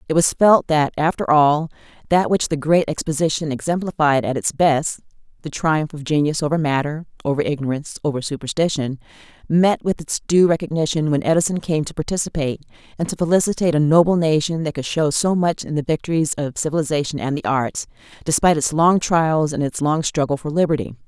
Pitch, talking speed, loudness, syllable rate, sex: 155 Hz, 175 wpm, -19 LUFS, 5.9 syllables/s, female